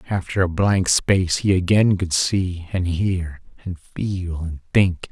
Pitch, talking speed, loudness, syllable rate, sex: 90 Hz, 165 wpm, -20 LUFS, 3.8 syllables/s, male